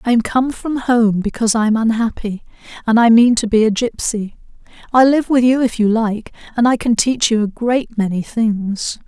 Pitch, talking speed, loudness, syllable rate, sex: 230 Hz, 200 wpm, -16 LUFS, 4.7 syllables/s, female